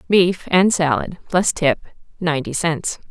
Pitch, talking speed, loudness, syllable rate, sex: 170 Hz, 135 wpm, -19 LUFS, 4.3 syllables/s, female